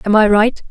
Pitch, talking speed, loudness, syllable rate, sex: 215 Hz, 255 wpm, -13 LUFS, 5.4 syllables/s, female